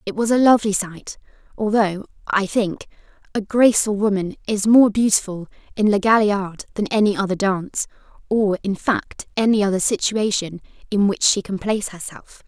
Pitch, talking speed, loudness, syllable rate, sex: 205 Hz, 160 wpm, -19 LUFS, 5.1 syllables/s, female